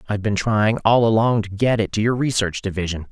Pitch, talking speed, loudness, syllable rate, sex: 110 Hz, 230 wpm, -19 LUFS, 5.9 syllables/s, male